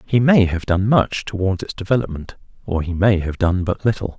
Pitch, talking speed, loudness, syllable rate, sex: 100 Hz, 215 wpm, -19 LUFS, 5.3 syllables/s, male